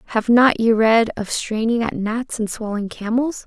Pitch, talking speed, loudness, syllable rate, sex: 225 Hz, 190 wpm, -19 LUFS, 4.8 syllables/s, female